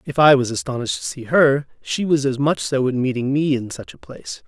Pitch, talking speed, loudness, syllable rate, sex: 135 Hz, 255 wpm, -19 LUFS, 5.7 syllables/s, male